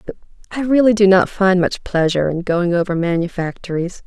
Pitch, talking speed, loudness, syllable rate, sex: 185 Hz, 175 wpm, -17 LUFS, 5.6 syllables/s, female